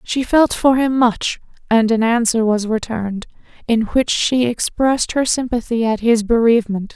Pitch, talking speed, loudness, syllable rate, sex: 230 Hz, 165 wpm, -17 LUFS, 4.7 syllables/s, female